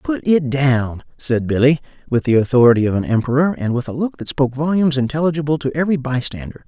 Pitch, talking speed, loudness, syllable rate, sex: 140 Hz, 205 wpm, -17 LUFS, 6.3 syllables/s, male